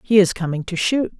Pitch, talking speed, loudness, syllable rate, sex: 190 Hz, 250 wpm, -19 LUFS, 5.8 syllables/s, female